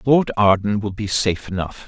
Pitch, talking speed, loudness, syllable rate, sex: 105 Hz, 190 wpm, -19 LUFS, 5.2 syllables/s, male